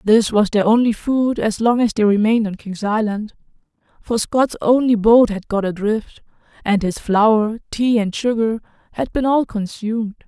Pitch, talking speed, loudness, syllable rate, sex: 220 Hz, 175 wpm, -18 LUFS, 4.6 syllables/s, female